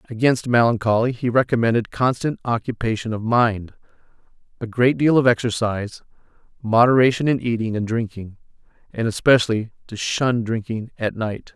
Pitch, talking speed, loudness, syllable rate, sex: 115 Hz, 130 wpm, -20 LUFS, 5.3 syllables/s, male